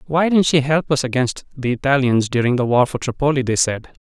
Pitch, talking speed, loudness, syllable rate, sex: 135 Hz, 225 wpm, -18 LUFS, 5.6 syllables/s, male